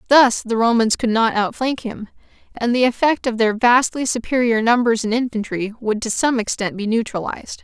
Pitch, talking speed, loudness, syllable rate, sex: 230 Hz, 180 wpm, -18 LUFS, 5.2 syllables/s, female